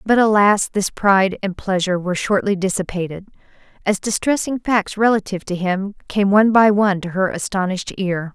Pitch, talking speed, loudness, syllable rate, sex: 195 Hz, 165 wpm, -18 LUFS, 5.6 syllables/s, female